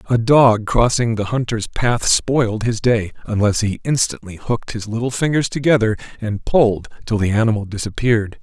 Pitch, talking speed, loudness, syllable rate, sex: 115 Hz, 165 wpm, -18 LUFS, 5.2 syllables/s, male